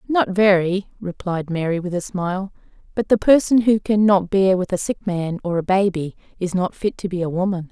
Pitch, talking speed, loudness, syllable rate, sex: 190 Hz, 220 wpm, -20 LUFS, 5.2 syllables/s, female